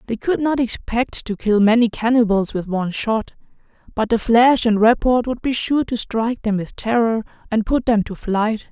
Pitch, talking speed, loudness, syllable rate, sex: 230 Hz, 200 wpm, -18 LUFS, 4.8 syllables/s, female